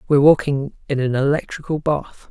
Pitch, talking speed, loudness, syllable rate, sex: 140 Hz, 155 wpm, -19 LUFS, 5.5 syllables/s, male